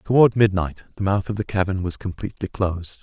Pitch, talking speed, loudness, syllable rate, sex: 100 Hz, 200 wpm, -22 LUFS, 6.2 syllables/s, male